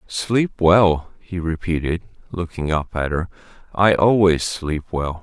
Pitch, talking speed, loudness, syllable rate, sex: 85 Hz, 140 wpm, -20 LUFS, 3.9 syllables/s, male